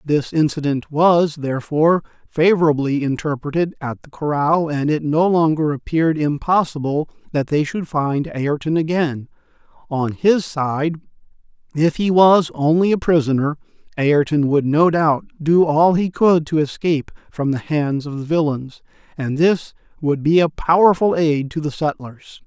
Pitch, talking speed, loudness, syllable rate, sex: 155 Hz, 150 wpm, -18 LUFS, 4.5 syllables/s, male